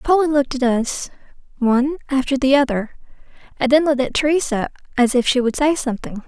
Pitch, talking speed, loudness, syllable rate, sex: 265 Hz, 180 wpm, -18 LUFS, 6.2 syllables/s, female